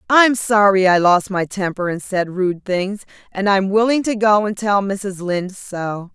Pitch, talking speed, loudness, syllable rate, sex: 195 Hz, 195 wpm, -17 LUFS, 4.3 syllables/s, female